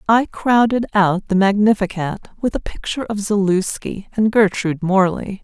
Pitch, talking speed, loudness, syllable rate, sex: 200 Hz, 145 wpm, -18 LUFS, 4.8 syllables/s, female